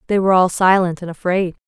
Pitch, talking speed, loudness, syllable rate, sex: 185 Hz, 215 wpm, -16 LUFS, 6.5 syllables/s, female